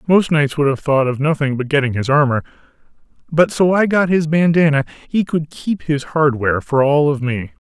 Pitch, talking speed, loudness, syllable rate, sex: 150 Hz, 205 wpm, -16 LUFS, 5.3 syllables/s, male